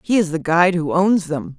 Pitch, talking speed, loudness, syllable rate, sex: 175 Hz, 265 wpm, -18 LUFS, 5.4 syllables/s, female